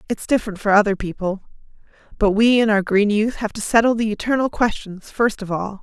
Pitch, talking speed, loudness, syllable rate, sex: 210 Hz, 205 wpm, -19 LUFS, 5.7 syllables/s, female